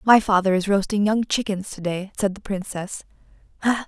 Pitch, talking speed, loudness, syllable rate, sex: 200 Hz, 170 wpm, -22 LUFS, 5.2 syllables/s, female